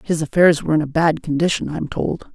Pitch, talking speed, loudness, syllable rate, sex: 160 Hz, 255 wpm, -18 LUFS, 6.3 syllables/s, female